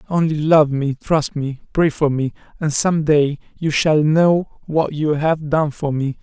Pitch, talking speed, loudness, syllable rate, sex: 150 Hz, 195 wpm, -18 LUFS, 3.9 syllables/s, male